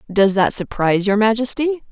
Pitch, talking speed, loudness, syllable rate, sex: 220 Hz, 155 wpm, -17 LUFS, 5.4 syllables/s, female